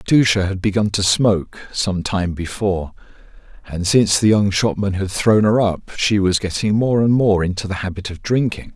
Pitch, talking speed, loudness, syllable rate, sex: 100 Hz, 190 wpm, -18 LUFS, 5.2 syllables/s, male